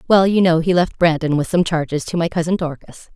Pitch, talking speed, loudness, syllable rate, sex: 170 Hz, 245 wpm, -17 LUFS, 5.7 syllables/s, female